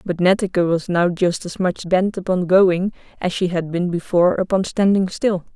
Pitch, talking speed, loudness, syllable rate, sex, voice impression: 180 Hz, 195 wpm, -19 LUFS, 4.9 syllables/s, female, feminine, adult-like, tensed, powerful, clear, slightly halting, nasal, intellectual, calm, friendly, reassuring, unique, kind